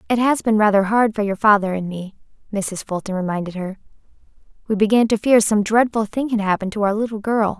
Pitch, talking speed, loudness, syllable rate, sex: 210 Hz, 215 wpm, -19 LUFS, 6.0 syllables/s, female